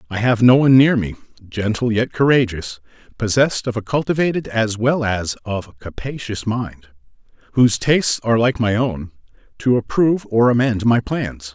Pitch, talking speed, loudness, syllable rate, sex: 115 Hz, 165 wpm, -18 LUFS, 5.2 syllables/s, male